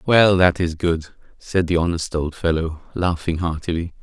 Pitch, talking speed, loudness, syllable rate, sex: 85 Hz, 165 wpm, -20 LUFS, 4.5 syllables/s, male